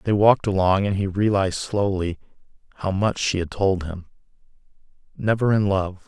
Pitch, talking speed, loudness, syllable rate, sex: 95 Hz, 160 wpm, -22 LUFS, 5.2 syllables/s, male